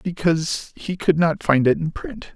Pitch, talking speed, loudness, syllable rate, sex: 165 Hz, 205 wpm, -20 LUFS, 4.5 syllables/s, male